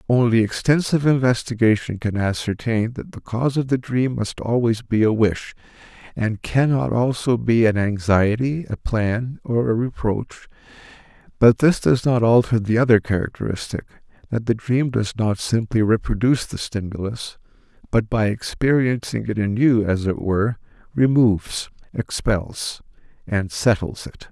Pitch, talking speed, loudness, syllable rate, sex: 115 Hz, 140 wpm, -20 LUFS, 4.7 syllables/s, male